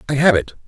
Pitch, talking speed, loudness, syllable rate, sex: 140 Hz, 265 wpm, -16 LUFS, 7.3 syllables/s, male